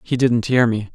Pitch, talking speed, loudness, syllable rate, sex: 120 Hz, 255 wpm, -18 LUFS, 4.8 syllables/s, male